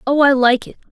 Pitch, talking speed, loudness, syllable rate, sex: 265 Hz, 260 wpm, -14 LUFS, 6.2 syllables/s, female